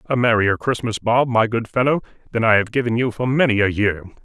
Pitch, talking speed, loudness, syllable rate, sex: 115 Hz, 225 wpm, -19 LUFS, 5.9 syllables/s, male